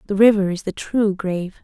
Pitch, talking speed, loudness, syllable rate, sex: 200 Hz, 220 wpm, -19 LUFS, 5.6 syllables/s, female